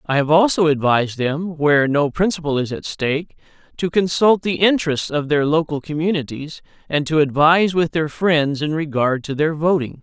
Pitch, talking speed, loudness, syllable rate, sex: 155 Hz, 180 wpm, -18 LUFS, 5.2 syllables/s, male